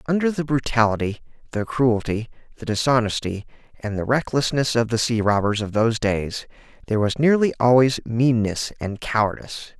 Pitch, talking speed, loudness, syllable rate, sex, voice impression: 120 Hz, 145 wpm, -21 LUFS, 5.4 syllables/s, male, masculine, adult-like, tensed, bright, clear, fluent, intellectual, friendly, reassuring, lively, light